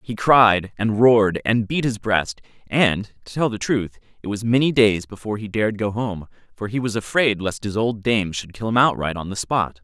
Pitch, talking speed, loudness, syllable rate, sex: 105 Hz, 225 wpm, -20 LUFS, 4.9 syllables/s, male